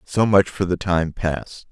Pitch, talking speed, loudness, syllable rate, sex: 90 Hz, 210 wpm, -20 LUFS, 3.8 syllables/s, male